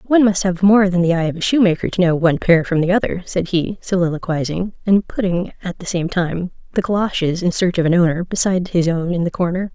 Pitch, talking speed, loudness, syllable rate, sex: 180 Hz, 240 wpm, -17 LUFS, 6.0 syllables/s, female